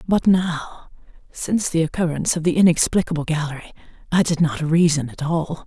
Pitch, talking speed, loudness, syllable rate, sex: 165 Hz, 160 wpm, -20 LUFS, 6.0 syllables/s, female